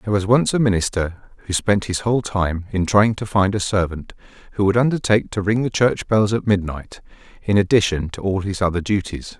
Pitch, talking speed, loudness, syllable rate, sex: 100 Hz, 210 wpm, -19 LUFS, 5.6 syllables/s, male